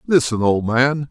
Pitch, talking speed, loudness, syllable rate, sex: 130 Hz, 160 wpm, -17 LUFS, 4.1 syllables/s, male